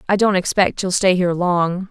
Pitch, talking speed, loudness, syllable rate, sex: 185 Hz, 220 wpm, -17 LUFS, 5.2 syllables/s, female